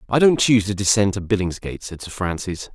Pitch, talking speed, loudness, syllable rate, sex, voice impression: 100 Hz, 220 wpm, -20 LUFS, 6.3 syllables/s, male, masculine, adult-like, tensed, powerful, hard, clear, fluent, cool, intellectual, wild, lively, slightly strict, sharp